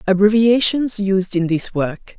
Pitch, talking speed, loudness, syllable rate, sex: 200 Hz, 135 wpm, -17 LUFS, 3.9 syllables/s, female